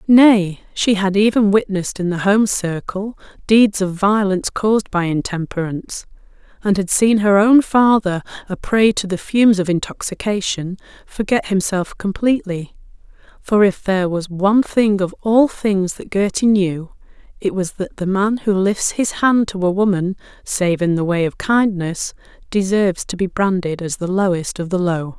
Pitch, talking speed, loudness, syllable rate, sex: 195 Hz, 170 wpm, -17 LUFS, 4.7 syllables/s, female